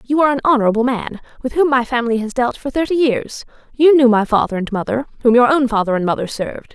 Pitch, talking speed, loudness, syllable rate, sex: 245 Hz, 240 wpm, -16 LUFS, 6.6 syllables/s, female